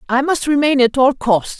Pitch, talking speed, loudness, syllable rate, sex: 265 Hz, 225 wpm, -15 LUFS, 5.0 syllables/s, female